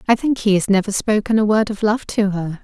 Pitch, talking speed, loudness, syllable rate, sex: 210 Hz, 275 wpm, -18 LUFS, 5.7 syllables/s, female